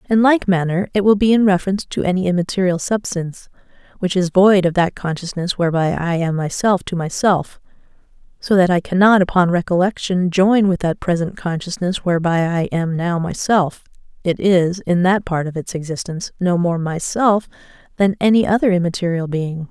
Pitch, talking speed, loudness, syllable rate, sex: 180 Hz, 170 wpm, -17 LUFS, 5.4 syllables/s, female